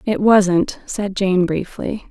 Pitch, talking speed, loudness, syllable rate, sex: 195 Hz, 145 wpm, -18 LUFS, 3.1 syllables/s, female